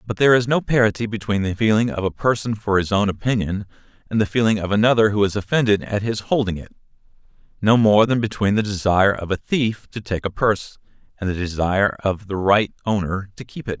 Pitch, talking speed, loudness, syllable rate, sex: 105 Hz, 215 wpm, -20 LUFS, 6.0 syllables/s, male